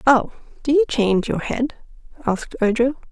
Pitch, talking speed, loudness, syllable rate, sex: 240 Hz, 155 wpm, -21 LUFS, 5.5 syllables/s, female